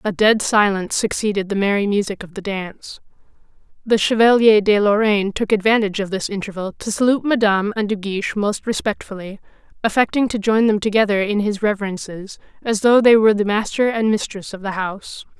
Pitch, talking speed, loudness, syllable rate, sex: 210 Hz, 180 wpm, -18 LUFS, 5.9 syllables/s, female